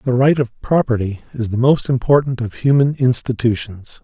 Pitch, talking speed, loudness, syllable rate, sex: 125 Hz, 165 wpm, -17 LUFS, 5.0 syllables/s, male